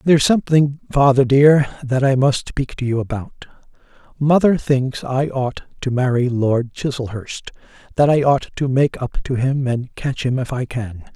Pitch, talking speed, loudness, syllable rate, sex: 130 Hz, 180 wpm, -18 LUFS, 4.5 syllables/s, male